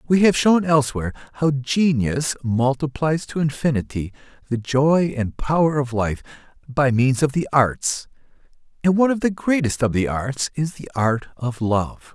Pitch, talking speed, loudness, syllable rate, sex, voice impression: 140 Hz, 165 wpm, -21 LUFS, 4.7 syllables/s, male, masculine, middle-aged, thick, tensed, powerful, slightly raspy, intellectual, mature, friendly, reassuring, wild, lively, kind